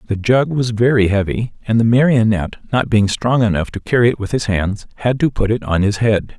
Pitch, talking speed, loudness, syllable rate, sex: 110 Hz, 235 wpm, -16 LUFS, 5.6 syllables/s, male